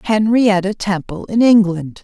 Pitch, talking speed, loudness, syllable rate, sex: 200 Hz, 120 wpm, -15 LUFS, 4.2 syllables/s, female